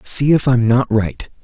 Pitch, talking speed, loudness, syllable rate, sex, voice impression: 120 Hz, 210 wpm, -15 LUFS, 4.0 syllables/s, male, masculine, adult-like, tensed, clear, cool, intellectual, reassuring, slightly wild, kind, slightly modest